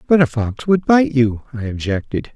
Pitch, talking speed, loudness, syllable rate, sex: 135 Hz, 205 wpm, -17 LUFS, 4.8 syllables/s, male